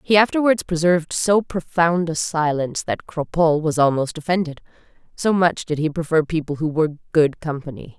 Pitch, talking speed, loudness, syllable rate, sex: 160 Hz, 165 wpm, -20 LUFS, 5.3 syllables/s, female